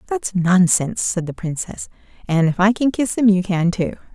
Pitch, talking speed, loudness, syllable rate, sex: 190 Hz, 205 wpm, -18 LUFS, 5.0 syllables/s, female